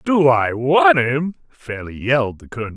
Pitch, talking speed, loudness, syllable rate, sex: 125 Hz, 175 wpm, -17 LUFS, 4.8 syllables/s, male